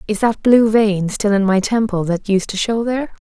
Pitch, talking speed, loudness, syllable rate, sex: 210 Hz, 240 wpm, -16 LUFS, 5.0 syllables/s, female